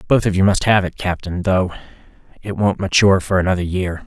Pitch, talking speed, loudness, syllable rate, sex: 95 Hz, 205 wpm, -17 LUFS, 5.9 syllables/s, male